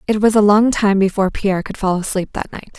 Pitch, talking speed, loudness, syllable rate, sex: 200 Hz, 260 wpm, -16 LUFS, 6.4 syllables/s, female